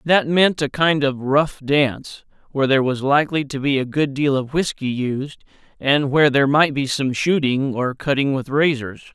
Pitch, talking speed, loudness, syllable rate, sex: 140 Hz, 195 wpm, -19 LUFS, 4.9 syllables/s, male